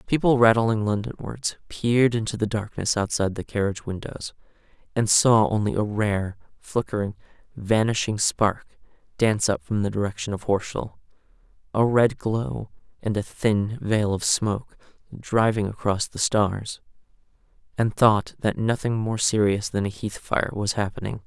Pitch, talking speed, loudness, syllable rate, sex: 105 Hz, 145 wpm, -24 LUFS, 4.7 syllables/s, male